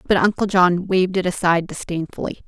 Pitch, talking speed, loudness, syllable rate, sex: 180 Hz, 170 wpm, -19 LUFS, 6.2 syllables/s, female